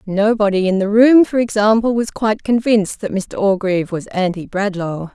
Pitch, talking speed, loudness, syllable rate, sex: 205 Hz, 175 wpm, -16 LUFS, 5.2 syllables/s, female